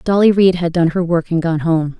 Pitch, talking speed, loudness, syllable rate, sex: 170 Hz, 270 wpm, -15 LUFS, 5.3 syllables/s, female